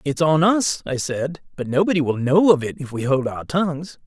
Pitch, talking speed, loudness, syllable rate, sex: 150 Hz, 235 wpm, -20 LUFS, 5.1 syllables/s, male